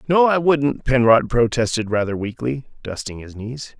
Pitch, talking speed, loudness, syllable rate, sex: 125 Hz, 160 wpm, -19 LUFS, 4.6 syllables/s, male